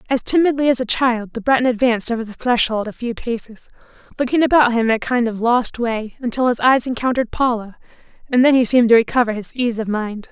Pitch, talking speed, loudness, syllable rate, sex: 240 Hz, 220 wpm, -18 LUFS, 6.2 syllables/s, female